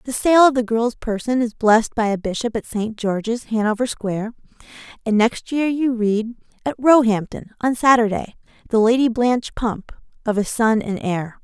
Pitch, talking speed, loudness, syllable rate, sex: 230 Hz, 180 wpm, -19 LUFS, 4.9 syllables/s, female